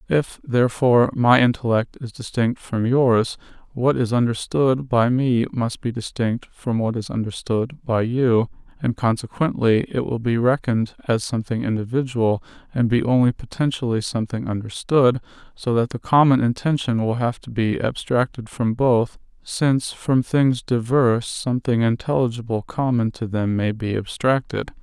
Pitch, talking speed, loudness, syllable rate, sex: 120 Hz, 145 wpm, -21 LUFS, 4.7 syllables/s, male